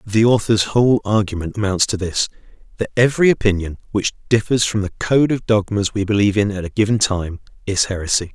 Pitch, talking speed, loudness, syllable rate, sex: 105 Hz, 185 wpm, -18 LUFS, 5.9 syllables/s, male